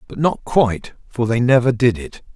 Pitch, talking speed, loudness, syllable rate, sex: 120 Hz, 205 wpm, -17 LUFS, 5.1 syllables/s, male